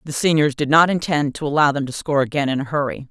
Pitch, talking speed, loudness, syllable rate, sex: 145 Hz, 270 wpm, -19 LUFS, 6.7 syllables/s, female